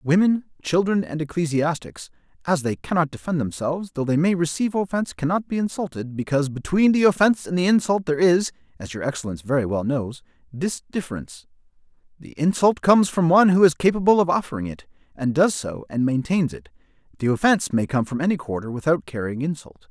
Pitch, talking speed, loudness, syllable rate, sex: 155 Hz, 185 wpm, -22 LUFS, 6.2 syllables/s, male